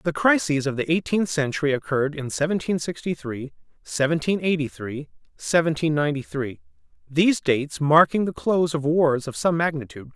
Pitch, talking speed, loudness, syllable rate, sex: 145 Hz, 160 wpm, -23 LUFS, 5.5 syllables/s, male